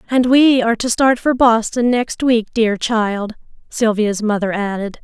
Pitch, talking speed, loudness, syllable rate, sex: 230 Hz, 165 wpm, -16 LUFS, 4.3 syllables/s, female